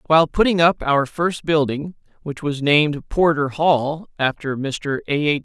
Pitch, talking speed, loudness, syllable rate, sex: 150 Hz, 165 wpm, -19 LUFS, 4.4 syllables/s, male